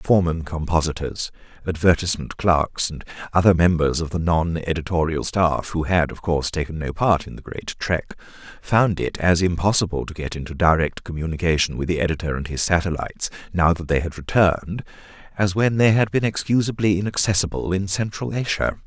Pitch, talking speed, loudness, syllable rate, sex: 90 Hz, 170 wpm, -21 LUFS, 5.6 syllables/s, male